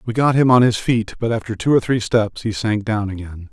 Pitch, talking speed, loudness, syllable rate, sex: 110 Hz, 275 wpm, -18 LUFS, 5.4 syllables/s, male